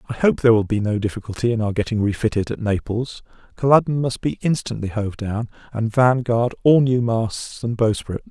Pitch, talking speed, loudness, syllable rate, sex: 115 Hz, 190 wpm, -20 LUFS, 5.4 syllables/s, male